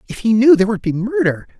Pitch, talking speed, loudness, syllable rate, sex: 200 Hz, 265 wpm, -15 LUFS, 6.8 syllables/s, male